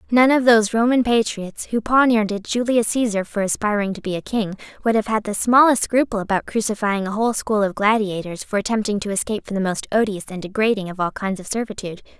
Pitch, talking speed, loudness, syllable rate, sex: 215 Hz, 210 wpm, -20 LUFS, 6.1 syllables/s, female